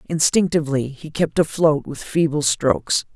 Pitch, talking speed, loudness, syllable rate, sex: 150 Hz, 135 wpm, -20 LUFS, 4.7 syllables/s, female